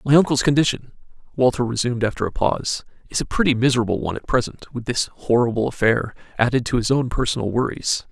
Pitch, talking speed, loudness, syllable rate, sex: 125 Hz, 185 wpm, -21 LUFS, 6.5 syllables/s, male